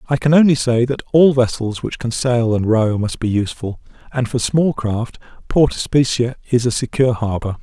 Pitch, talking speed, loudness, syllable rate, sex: 120 Hz, 195 wpm, -17 LUFS, 5.2 syllables/s, male